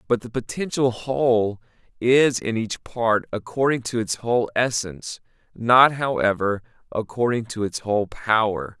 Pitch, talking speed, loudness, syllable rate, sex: 115 Hz, 135 wpm, -22 LUFS, 4.5 syllables/s, male